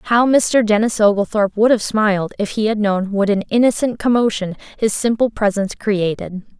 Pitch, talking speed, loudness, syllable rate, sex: 210 Hz, 175 wpm, -17 LUFS, 5.2 syllables/s, female